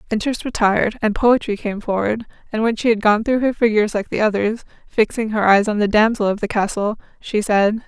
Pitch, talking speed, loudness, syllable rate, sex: 215 Hz, 215 wpm, -18 LUFS, 5.8 syllables/s, female